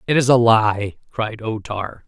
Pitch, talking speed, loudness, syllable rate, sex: 110 Hz, 200 wpm, -19 LUFS, 3.9 syllables/s, male